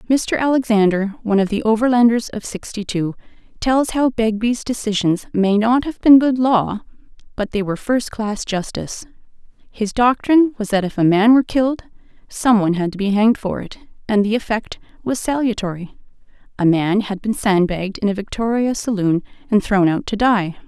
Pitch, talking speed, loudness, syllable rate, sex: 215 Hz, 175 wpm, -18 LUFS, 5.3 syllables/s, female